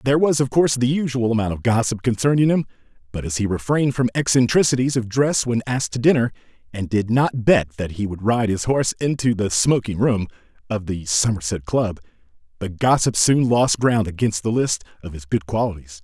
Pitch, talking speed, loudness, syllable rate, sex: 115 Hz, 200 wpm, -20 LUFS, 5.6 syllables/s, male